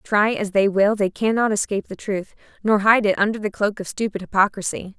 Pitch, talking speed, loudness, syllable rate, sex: 205 Hz, 215 wpm, -20 LUFS, 5.6 syllables/s, female